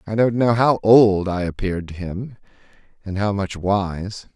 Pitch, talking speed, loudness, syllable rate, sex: 100 Hz, 165 wpm, -19 LUFS, 4.3 syllables/s, male